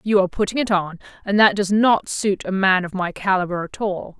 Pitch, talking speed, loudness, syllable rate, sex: 195 Hz, 245 wpm, -20 LUFS, 5.5 syllables/s, female